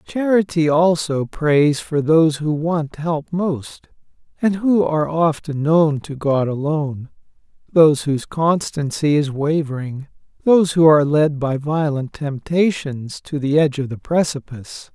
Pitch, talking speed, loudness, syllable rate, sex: 150 Hz, 135 wpm, -18 LUFS, 4.4 syllables/s, male